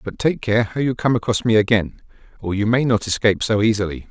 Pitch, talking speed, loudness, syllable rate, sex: 110 Hz, 235 wpm, -19 LUFS, 6.0 syllables/s, male